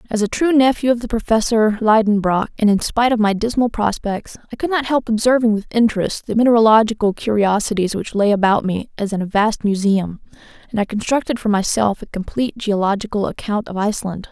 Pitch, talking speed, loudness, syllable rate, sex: 215 Hz, 190 wpm, -17 LUFS, 5.9 syllables/s, female